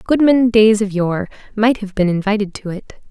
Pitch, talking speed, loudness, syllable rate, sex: 210 Hz, 195 wpm, -15 LUFS, 4.9 syllables/s, female